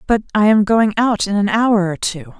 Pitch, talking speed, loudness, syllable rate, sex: 205 Hz, 250 wpm, -15 LUFS, 4.8 syllables/s, female